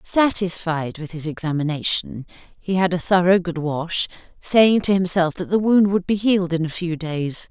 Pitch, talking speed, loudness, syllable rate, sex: 175 Hz, 185 wpm, -20 LUFS, 4.7 syllables/s, female